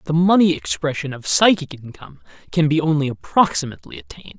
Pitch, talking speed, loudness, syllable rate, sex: 145 Hz, 150 wpm, -18 LUFS, 6.4 syllables/s, male